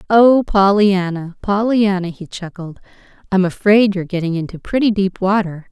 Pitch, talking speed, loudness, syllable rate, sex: 195 Hz, 135 wpm, -16 LUFS, 4.8 syllables/s, female